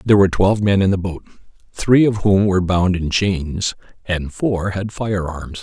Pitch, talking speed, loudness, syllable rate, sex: 95 Hz, 205 wpm, -18 LUFS, 4.8 syllables/s, male